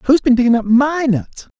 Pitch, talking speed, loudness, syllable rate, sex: 250 Hz, 225 wpm, -14 LUFS, 4.7 syllables/s, male